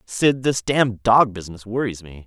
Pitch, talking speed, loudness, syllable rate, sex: 110 Hz, 185 wpm, -20 LUFS, 4.6 syllables/s, male